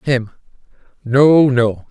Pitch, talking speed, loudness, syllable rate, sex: 130 Hz, 95 wpm, -14 LUFS, 2.9 syllables/s, male